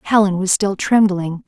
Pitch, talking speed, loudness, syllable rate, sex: 195 Hz, 165 wpm, -16 LUFS, 4.5 syllables/s, female